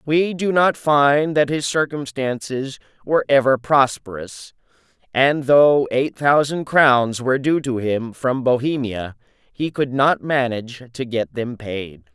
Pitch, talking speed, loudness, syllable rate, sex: 135 Hz, 145 wpm, -19 LUFS, 3.9 syllables/s, male